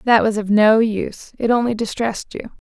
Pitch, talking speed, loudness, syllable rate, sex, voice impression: 220 Hz, 200 wpm, -18 LUFS, 5.4 syllables/s, female, feminine, slightly adult-like, slightly cute, friendly, slightly kind